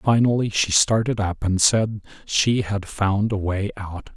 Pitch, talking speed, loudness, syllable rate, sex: 105 Hz, 175 wpm, -21 LUFS, 4.0 syllables/s, male